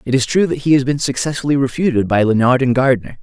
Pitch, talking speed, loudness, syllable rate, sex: 130 Hz, 240 wpm, -15 LUFS, 6.4 syllables/s, male